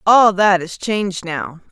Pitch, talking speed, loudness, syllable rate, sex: 195 Hz, 175 wpm, -16 LUFS, 4.0 syllables/s, female